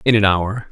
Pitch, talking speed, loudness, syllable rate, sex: 105 Hz, 255 wpm, -16 LUFS, 4.9 syllables/s, male